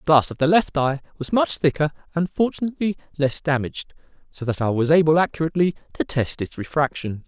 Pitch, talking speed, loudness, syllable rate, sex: 150 Hz, 190 wpm, -22 LUFS, 6.1 syllables/s, male